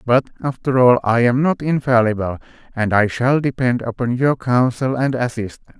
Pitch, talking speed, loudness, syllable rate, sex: 125 Hz, 165 wpm, -18 LUFS, 5.0 syllables/s, male